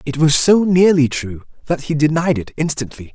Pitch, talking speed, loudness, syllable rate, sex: 150 Hz, 190 wpm, -16 LUFS, 5.1 syllables/s, male